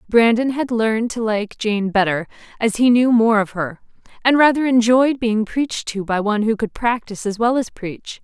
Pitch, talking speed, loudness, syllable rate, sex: 225 Hz, 205 wpm, -18 LUFS, 5.1 syllables/s, female